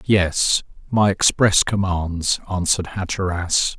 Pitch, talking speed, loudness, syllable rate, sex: 95 Hz, 95 wpm, -19 LUFS, 3.6 syllables/s, male